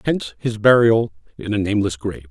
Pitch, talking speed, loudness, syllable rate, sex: 105 Hz, 180 wpm, -19 LUFS, 6.5 syllables/s, male